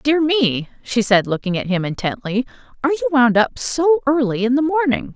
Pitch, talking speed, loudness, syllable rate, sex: 250 Hz, 200 wpm, -18 LUFS, 5.2 syllables/s, female